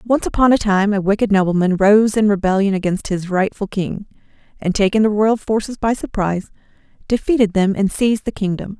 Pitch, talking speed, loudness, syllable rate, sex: 205 Hz, 185 wpm, -17 LUFS, 5.7 syllables/s, female